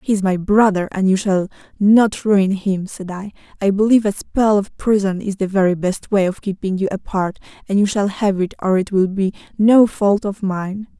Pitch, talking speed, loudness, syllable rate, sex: 200 Hz, 215 wpm, -17 LUFS, 4.8 syllables/s, female